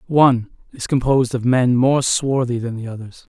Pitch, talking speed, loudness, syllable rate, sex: 125 Hz, 175 wpm, -18 LUFS, 5.2 syllables/s, male